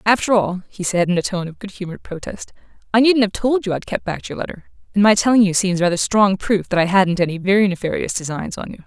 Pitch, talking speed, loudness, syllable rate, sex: 195 Hz, 255 wpm, -18 LUFS, 6.2 syllables/s, female